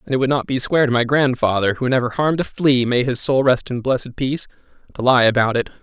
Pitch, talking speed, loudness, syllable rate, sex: 130 Hz, 245 wpm, -18 LUFS, 6.5 syllables/s, male